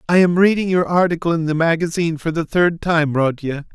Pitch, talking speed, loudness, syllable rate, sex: 165 Hz, 210 wpm, -17 LUFS, 5.7 syllables/s, male